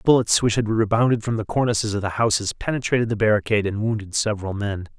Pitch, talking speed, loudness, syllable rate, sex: 110 Hz, 205 wpm, -21 LUFS, 6.7 syllables/s, male